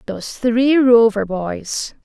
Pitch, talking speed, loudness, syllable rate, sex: 230 Hz, 120 wpm, -16 LUFS, 3.3 syllables/s, female